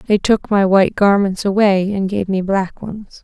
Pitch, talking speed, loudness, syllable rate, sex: 195 Hz, 205 wpm, -15 LUFS, 4.4 syllables/s, female